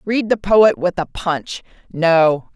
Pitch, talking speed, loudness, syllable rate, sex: 180 Hz, 165 wpm, -16 LUFS, 3.3 syllables/s, female